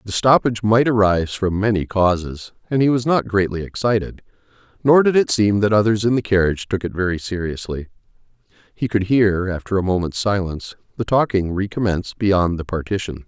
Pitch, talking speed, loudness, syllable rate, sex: 100 Hz, 175 wpm, -19 LUFS, 5.7 syllables/s, male